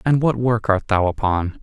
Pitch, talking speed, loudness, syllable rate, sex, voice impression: 110 Hz, 220 wpm, -19 LUFS, 4.6 syllables/s, male, masculine, adult-like, slightly thick, slightly cool, sincere, slightly calm, slightly kind